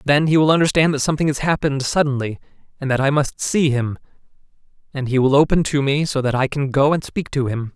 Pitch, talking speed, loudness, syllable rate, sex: 140 Hz, 230 wpm, -18 LUFS, 6.2 syllables/s, male